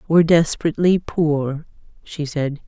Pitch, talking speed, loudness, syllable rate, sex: 155 Hz, 110 wpm, -19 LUFS, 4.7 syllables/s, female